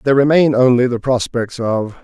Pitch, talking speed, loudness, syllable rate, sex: 125 Hz, 175 wpm, -15 LUFS, 5.4 syllables/s, male